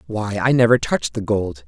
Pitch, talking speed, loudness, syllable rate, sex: 105 Hz, 215 wpm, -19 LUFS, 5.4 syllables/s, male